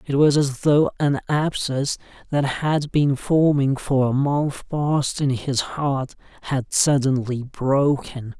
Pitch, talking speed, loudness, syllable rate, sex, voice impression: 140 Hz, 145 wpm, -21 LUFS, 3.4 syllables/s, male, very masculine, slightly middle-aged, slightly thick, sincere, calm